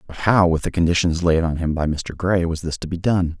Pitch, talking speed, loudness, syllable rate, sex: 85 Hz, 280 wpm, -20 LUFS, 5.7 syllables/s, male